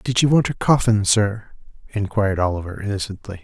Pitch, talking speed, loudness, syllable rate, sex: 105 Hz, 155 wpm, -20 LUFS, 5.7 syllables/s, male